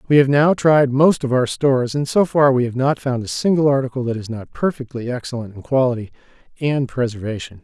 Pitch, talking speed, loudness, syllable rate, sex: 130 Hz, 210 wpm, -18 LUFS, 5.8 syllables/s, male